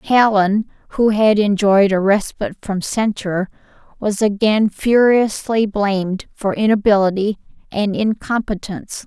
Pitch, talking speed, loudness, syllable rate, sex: 205 Hz, 105 wpm, -17 LUFS, 4.3 syllables/s, female